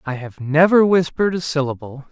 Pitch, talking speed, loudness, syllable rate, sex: 155 Hz, 170 wpm, -17 LUFS, 5.6 syllables/s, male